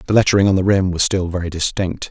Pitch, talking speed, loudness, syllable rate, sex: 95 Hz, 255 wpm, -17 LUFS, 6.7 syllables/s, male